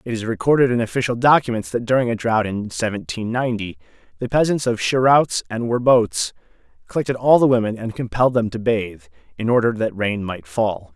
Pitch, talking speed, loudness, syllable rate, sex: 115 Hz, 185 wpm, -19 LUFS, 5.7 syllables/s, male